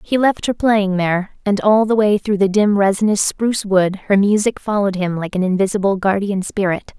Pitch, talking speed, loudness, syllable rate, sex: 200 Hz, 205 wpm, -17 LUFS, 5.3 syllables/s, female